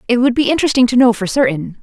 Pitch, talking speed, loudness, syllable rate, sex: 240 Hz, 265 wpm, -14 LUFS, 7.3 syllables/s, female